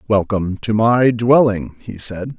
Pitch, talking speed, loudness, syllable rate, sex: 110 Hz, 150 wpm, -16 LUFS, 4.1 syllables/s, male